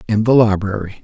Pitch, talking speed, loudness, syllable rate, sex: 105 Hz, 175 wpm, -15 LUFS, 5.8 syllables/s, male